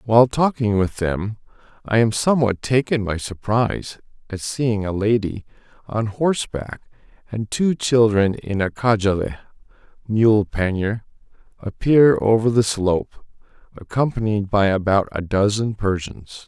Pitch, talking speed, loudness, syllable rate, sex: 110 Hz, 125 wpm, -20 LUFS, 4.5 syllables/s, male